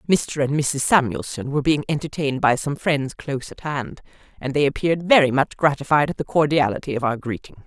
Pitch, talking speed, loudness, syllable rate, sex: 145 Hz, 195 wpm, -21 LUFS, 5.8 syllables/s, female